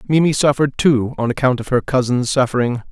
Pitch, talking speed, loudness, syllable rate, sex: 130 Hz, 185 wpm, -17 LUFS, 6.1 syllables/s, male